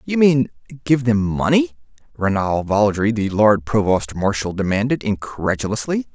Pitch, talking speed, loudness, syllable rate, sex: 110 Hz, 125 wpm, -19 LUFS, 4.7 syllables/s, male